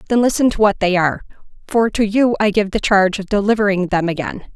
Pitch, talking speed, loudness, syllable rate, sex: 205 Hz, 225 wpm, -16 LUFS, 6.2 syllables/s, female